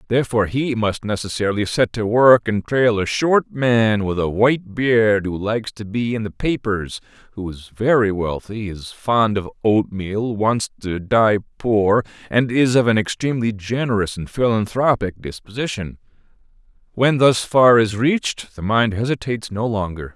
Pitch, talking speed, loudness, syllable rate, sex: 110 Hz, 160 wpm, -19 LUFS, 4.6 syllables/s, male